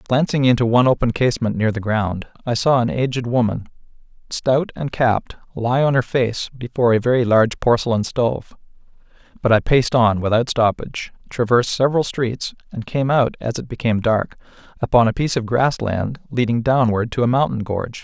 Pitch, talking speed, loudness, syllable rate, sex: 120 Hz, 180 wpm, -19 LUFS, 5.7 syllables/s, male